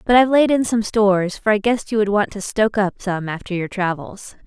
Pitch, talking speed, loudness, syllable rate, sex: 205 Hz, 255 wpm, -19 LUFS, 5.7 syllables/s, female